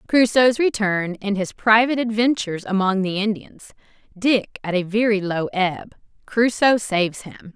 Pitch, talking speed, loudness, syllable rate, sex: 210 Hz, 125 wpm, -20 LUFS, 4.6 syllables/s, female